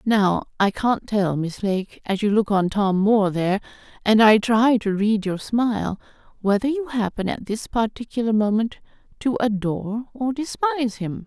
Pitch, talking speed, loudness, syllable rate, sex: 215 Hz, 170 wpm, -22 LUFS, 4.7 syllables/s, female